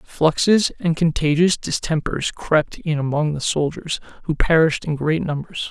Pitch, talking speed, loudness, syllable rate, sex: 155 Hz, 145 wpm, -20 LUFS, 4.5 syllables/s, male